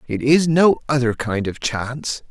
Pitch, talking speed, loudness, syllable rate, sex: 130 Hz, 180 wpm, -19 LUFS, 4.5 syllables/s, male